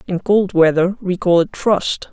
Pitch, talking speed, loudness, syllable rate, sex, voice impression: 185 Hz, 200 wpm, -16 LUFS, 4.2 syllables/s, female, feminine, adult-like, slightly intellectual, slightly calm, slightly sweet